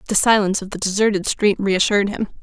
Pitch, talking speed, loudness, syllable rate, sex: 200 Hz, 200 wpm, -18 LUFS, 6.5 syllables/s, female